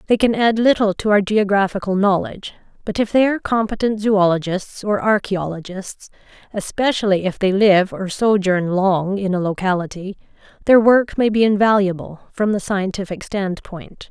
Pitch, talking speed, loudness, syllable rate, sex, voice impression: 200 Hz, 150 wpm, -18 LUFS, 4.9 syllables/s, female, feminine, middle-aged, tensed, powerful, clear, fluent, intellectual, friendly, elegant, lively, slightly strict